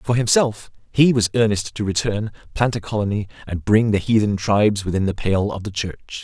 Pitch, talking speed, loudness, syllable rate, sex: 105 Hz, 200 wpm, -20 LUFS, 5.3 syllables/s, male